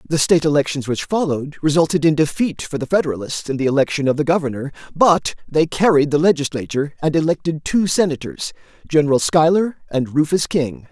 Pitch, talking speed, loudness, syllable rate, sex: 150 Hz, 165 wpm, -18 LUFS, 6.0 syllables/s, male